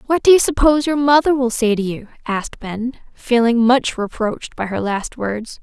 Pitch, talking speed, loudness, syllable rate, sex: 240 Hz, 205 wpm, -17 LUFS, 5.1 syllables/s, female